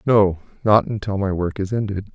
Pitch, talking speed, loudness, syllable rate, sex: 100 Hz, 195 wpm, -20 LUFS, 5.2 syllables/s, male